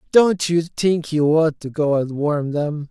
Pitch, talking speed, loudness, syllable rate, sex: 155 Hz, 205 wpm, -19 LUFS, 3.8 syllables/s, male